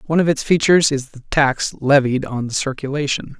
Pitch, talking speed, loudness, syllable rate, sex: 140 Hz, 195 wpm, -18 LUFS, 5.6 syllables/s, male